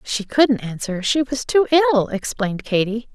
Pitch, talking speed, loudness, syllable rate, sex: 235 Hz, 170 wpm, -19 LUFS, 4.7 syllables/s, female